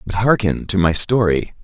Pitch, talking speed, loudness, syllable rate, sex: 100 Hz, 185 wpm, -17 LUFS, 4.8 syllables/s, male